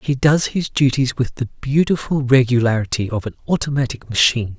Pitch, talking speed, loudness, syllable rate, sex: 125 Hz, 155 wpm, -18 LUFS, 5.5 syllables/s, male